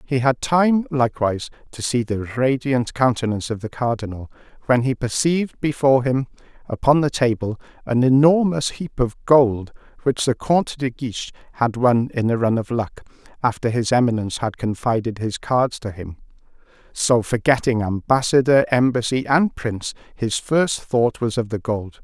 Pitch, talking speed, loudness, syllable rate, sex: 125 Hz, 160 wpm, -20 LUFS, 5.0 syllables/s, male